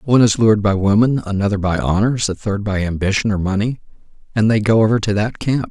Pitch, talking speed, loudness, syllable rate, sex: 105 Hz, 220 wpm, -17 LUFS, 6.1 syllables/s, male